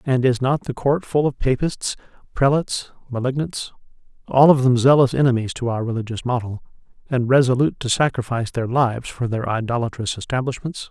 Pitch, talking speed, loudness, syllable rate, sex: 125 Hz, 160 wpm, -20 LUFS, 5.7 syllables/s, male